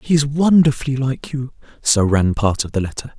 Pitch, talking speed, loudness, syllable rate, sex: 130 Hz, 205 wpm, -18 LUFS, 5.4 syllables/s, male